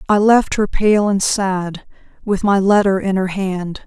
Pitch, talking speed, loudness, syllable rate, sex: 195 Hz, 185 wpm, -16 LUFS, 3.9 syllables/s, female